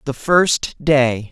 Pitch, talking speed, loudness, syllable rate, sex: 140 Hz, 135 wpm, -16 LUFS, 2.6 syllables/s, male